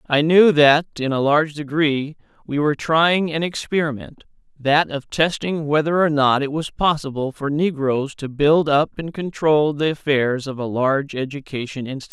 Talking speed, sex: 170 wpm, male